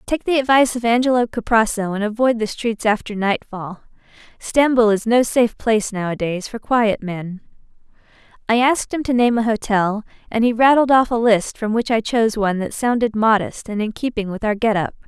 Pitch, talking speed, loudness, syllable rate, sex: 225 Hz, 195 wpm, -18 LUFS, 5.5 syllables/s, female